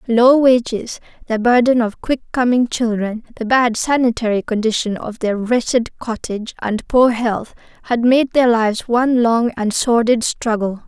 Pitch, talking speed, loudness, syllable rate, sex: 235 Hz, 155 wpm, -17 LUFS, 4.5 syllables/s, female